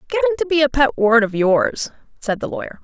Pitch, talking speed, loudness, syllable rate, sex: 245 Hz, 235 wpm, -18 LUFS, 5.6 syllables/s, female